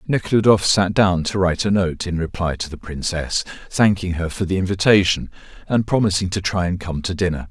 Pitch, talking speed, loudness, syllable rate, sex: 90 Hz, 200 wpm, -19 LUFS, 5.5 syllables/s, male